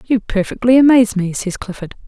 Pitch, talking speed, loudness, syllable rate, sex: 220 Hz, 175 wpm, -14 LUFS, 5.8 syllables/s, female